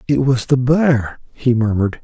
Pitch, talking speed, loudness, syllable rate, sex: 125 Hz, 175 wpm, -16 LUFS, 4.6 syllables/s, male